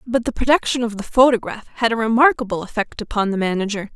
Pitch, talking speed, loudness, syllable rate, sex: 225 Hz, 195 wpm, -19 LUFS, 6.6 syllables/s, female